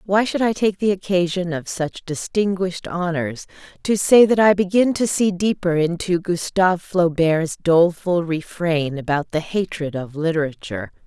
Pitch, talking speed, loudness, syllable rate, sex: 175 Hz, 150 wpm, -20 LUFS, 4.7 syllables/s, female